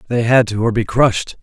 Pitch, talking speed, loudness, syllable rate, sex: 115 Hz, 255 wpm, -15 LUFS, 5.8 syllables/s, male